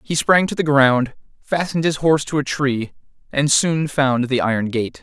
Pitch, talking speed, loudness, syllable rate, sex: 140 Hz, 205 wpm, -18 LUFS, 4.9 syllables/s, male